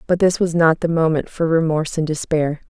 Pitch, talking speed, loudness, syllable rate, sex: 160 Hz, 220 wpm, -18 LUFS, 5.7 syllables/s, female